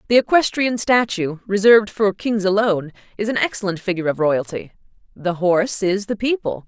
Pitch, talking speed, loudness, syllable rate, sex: 200 Hz, 160 wpm, -19 LUFS, 5.6 syllables/s, female